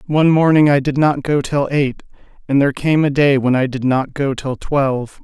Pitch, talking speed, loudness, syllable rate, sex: 140 Hz, 230 wpm, -16 LUFS, 5.2 syllables/s, male